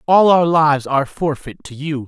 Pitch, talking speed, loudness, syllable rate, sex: 150 Hz, 200 wpm, -15 LUFS, 5.2 syllables/s, male